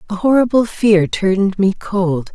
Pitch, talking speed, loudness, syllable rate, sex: 200 Hz, 155 wpm, -15 LUFS, 4.2 syllables/s, female